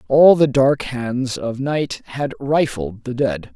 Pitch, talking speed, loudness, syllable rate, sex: 130 Hz, 170 wpm, -19 LUFS, 3.4 syllables/s, male